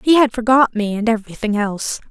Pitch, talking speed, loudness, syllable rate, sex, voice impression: 225 Hz, 200 wpm, -17 LUFS, 6.2 syllables/s, female, feminine, slightly young, relaxed, powerful, soft, slightly muffled, raspy, refreshing, calm, slightly friendly, slightly reassuring, elegant, lively, slightly sharp, slightly modest